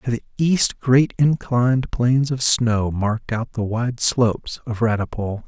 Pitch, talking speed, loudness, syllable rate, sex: 120 Hz, 165 wpm, -20 LUFS, 4.4 syllables/s, male